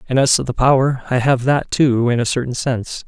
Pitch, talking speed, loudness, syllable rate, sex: 130 Hz, 255 wpm, -17 LUFS, 5.6 syllables/s, male